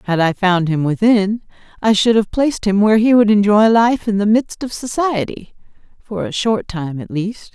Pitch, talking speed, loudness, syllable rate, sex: 210 Hz, 205 wpm, -16 LUFS, 4.9 syllables/s, female